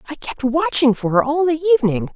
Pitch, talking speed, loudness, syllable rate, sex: 270 Hz, 220 wpm, -17 LUFS, 6.4 syllables/s, female